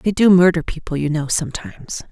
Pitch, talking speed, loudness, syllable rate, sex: 175 Hz, 200 wpm, -17 LUFS, 5.9 syllables/s, female